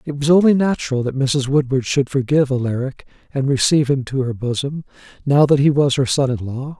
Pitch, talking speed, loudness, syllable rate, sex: 135 Hz, 210 wpm, -18 LUFS, 5.8 syllables/s, male